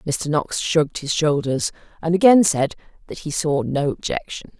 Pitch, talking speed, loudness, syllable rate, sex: 155 Hz, 170 wpm, -20 LUFS, 4.8 syllables/s, female